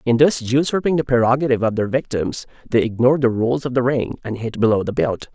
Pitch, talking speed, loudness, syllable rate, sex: 125 Hz, 225 wpm, -19 LUFS, 6.0 syllables/s, male